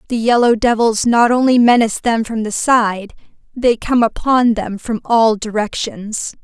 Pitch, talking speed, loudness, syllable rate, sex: 230 Hz, 160 wpm, -15 LUFS, 4.3 syllables/s, female